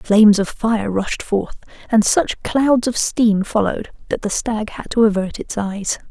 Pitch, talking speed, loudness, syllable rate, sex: 215 Hz, 185 wpm, -18 LUFS, 4.2 syllables/s, female